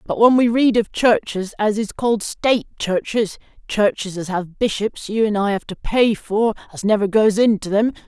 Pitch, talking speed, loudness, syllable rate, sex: 210 Hz, 195 wpm, -19 LUFS, 4.9 syllables/s, female